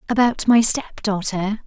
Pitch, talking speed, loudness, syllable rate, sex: 215 Hz, 145 wpm, -19 LUFS, 4.2 syllables/s, female